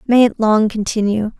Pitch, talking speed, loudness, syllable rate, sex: 220 Hz, 175 wpm, -15 LUFS, 5.0 syllables/s, female